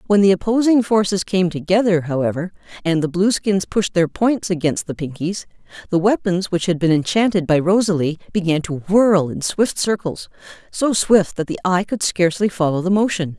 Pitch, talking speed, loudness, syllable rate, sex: 185 Hz, 175 wpm, -18 LUFS, 5.2 syllables/s, female